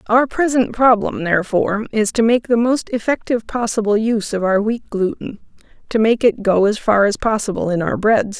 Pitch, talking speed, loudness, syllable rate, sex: 220 Hz, 195 wpm, -17 LUFS, 5.4 syllables/s, female